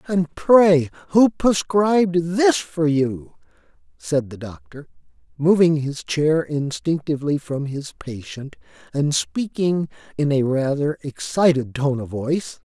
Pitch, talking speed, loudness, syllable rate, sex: 155 Hz, 125 wpm, -20 LUFS, 3.9 syllables/s, male